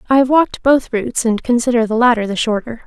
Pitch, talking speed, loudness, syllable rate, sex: 235 Hz, 230 wpm, -15 LUFS, 6.4 syllables/s, female